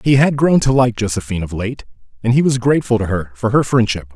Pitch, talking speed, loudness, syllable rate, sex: 115 Hz, 245 wpm, -16 LUFS, 6.3 syllables/s, male